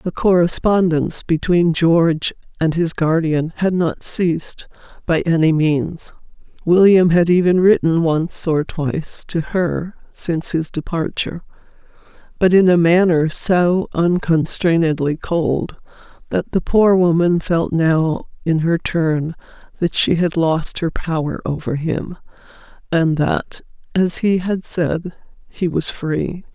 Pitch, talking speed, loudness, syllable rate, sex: 170 Hz, 130 wpm, -17 LUFS, 3.9 syllables/s, female